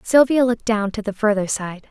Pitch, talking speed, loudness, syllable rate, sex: 220 Hz, 220 wpm, -19 LUFS, 5.5 syllables/s, female